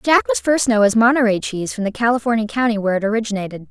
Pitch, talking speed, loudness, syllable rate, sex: 225 Hz, 225 wpm, -17 LUFS, 7.3 syllables/s, female